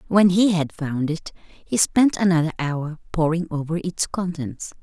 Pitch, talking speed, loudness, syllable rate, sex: 170 Hz, 160 wpm, -22 LUFS, 4.3 syllables/s, female